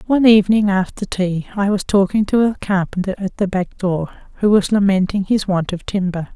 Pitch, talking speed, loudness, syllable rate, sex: 195 Hz, 200 wpm, -17 LUFS, 5.4 syllables/s, female